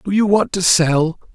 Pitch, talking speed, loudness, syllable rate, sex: 180 Hz, 225 wpm, -16 LUFS, 4.6 syllables/s, male